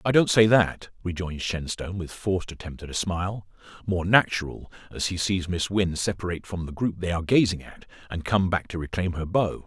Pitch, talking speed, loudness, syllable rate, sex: 90 Hz, 205 wpm, -25 LUFS, 5.6 syllables/s, male